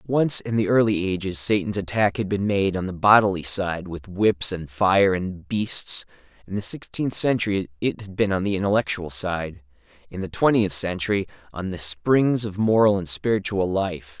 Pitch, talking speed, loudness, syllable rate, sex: 95 Hz, 180 wpm, -22 LUFS, 4.7 syllables/s, male